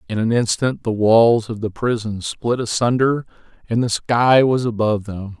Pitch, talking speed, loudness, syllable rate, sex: 115 Hz, 180 wpm, -18 LUFS, 4.6 syllables/s, male